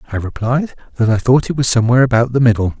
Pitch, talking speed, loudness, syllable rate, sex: 120 Hz, 235 wpm, -14 LUFS, 7.4 syllables/s, male